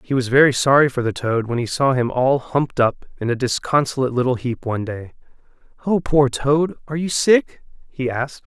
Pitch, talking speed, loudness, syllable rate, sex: 135 Hz, 205 wpm, -19 LUFS, 5.6 syllables/s, male